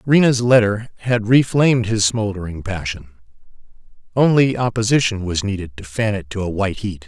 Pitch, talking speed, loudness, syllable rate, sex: 110 Hz, 160 wpm, -18 LUFS, 5.6 syllables/s, male